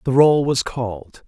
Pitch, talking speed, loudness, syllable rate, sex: 125 Hz, 190 wpm, -18 LUFS, 4.4 syllables/s, male